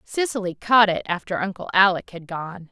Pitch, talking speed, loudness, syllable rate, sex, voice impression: 190 Hz, 175 wpm, -21 LUFS, 5.1 syllables/s, female, feminine, slightly young, slightly adult-like, thin, tensed, slightly powerful, bright, slightly hard, clear, fluent, cool, intellectual, very refreshing, sincere, calm, friendly, reassuring, slightly unique, wild, slightly sweet, very lively, slightly strict, slightly intense